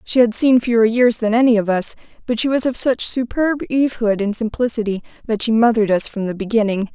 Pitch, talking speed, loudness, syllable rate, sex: 225 Hz, 215 wpm, -17 LUFS, 5.9 syllables/s, female